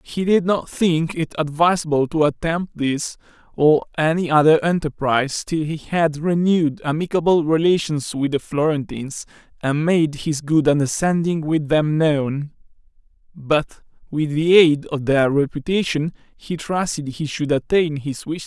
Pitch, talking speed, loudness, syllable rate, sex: 155 Hz, 145 wpm, -19 LUFS, 4.5 syllables/s, male